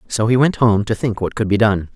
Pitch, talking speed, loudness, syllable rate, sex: 110 Hz, 305 wpm, -17 LUFS, 5.7 syllables/s, male